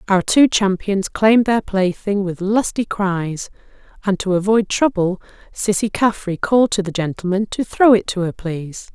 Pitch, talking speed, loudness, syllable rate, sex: 200 Hz, 170 wpm, -18 LUFS, 4.7 syllables/s, female